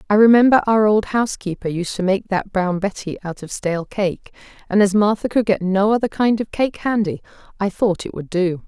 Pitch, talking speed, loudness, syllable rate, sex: 200 Hz, 215 wpm, -19 LUFS, 5.4 syllables/s, female